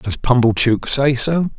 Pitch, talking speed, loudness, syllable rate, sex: 125 Hz, 150 wpm, -16 LUFS, 4.0 syllables/s, male